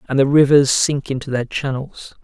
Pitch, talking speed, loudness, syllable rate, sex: 135 Hz, 190 wpm, -17 LUFS, 4.8 syllables/s, male